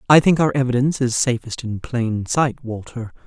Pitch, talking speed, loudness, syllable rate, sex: 125 Hz, 185 wpm, -20 LUFS, 5.0 syllables/s, female